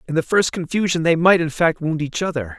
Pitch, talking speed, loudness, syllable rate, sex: 165 Hz, 255 wpm, -19 LUFS, 5.8 syllables/s, male